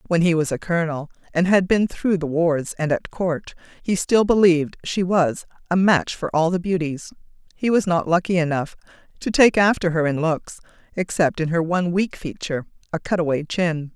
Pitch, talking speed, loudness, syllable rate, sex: 170 Hz, 195 wpm, -21 LUFS, 5.2 syllables/s, female